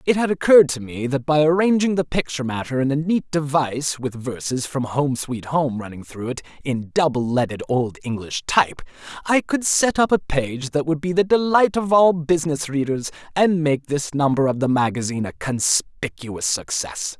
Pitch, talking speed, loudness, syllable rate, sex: 145 Hz, 190 wpm, -20 LUFS, 5.1 syllables/s, male